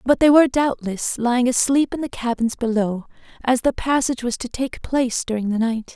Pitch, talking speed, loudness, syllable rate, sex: 245 Hz, 200 wpm, -20 LUFS, 5.5 syllables/s, female